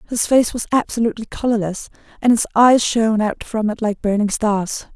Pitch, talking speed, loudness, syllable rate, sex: 220 Hz, 180 wpm, -18 LUFS, 5.4 syllables/s, female